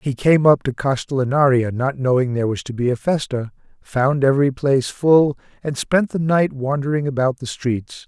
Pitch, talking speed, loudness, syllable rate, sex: 135 Hz, 185 wpm, -19 LUFS, 5.1 syllables/s, male